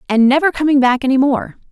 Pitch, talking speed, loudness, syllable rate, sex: 260 Hz, 210 wpm, -14 LUFS, 6.3 syllables/s, female